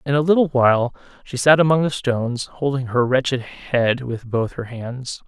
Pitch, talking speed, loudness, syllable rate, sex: 130 Hz, 195 wpm, -20 LUFS, 4.8 syllables/s, male